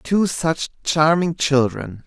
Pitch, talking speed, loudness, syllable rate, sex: 155 Hz, 115 wpm, -19 LUFS, 3.2 syllables/s, male